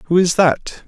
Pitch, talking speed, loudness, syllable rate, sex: 165 Hz, 205 wpm, -15 LUFS, 3.6 syllables/s, male